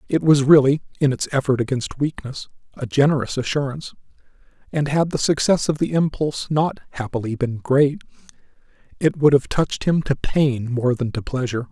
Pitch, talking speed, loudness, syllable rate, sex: 140 Hz, 170 wpm, -20 LUFS, 5.5 syllables/s, male